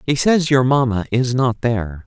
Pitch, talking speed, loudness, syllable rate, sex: 125 Hz, 205 wpm, -17 LUFS, 4.8 syllables/s, male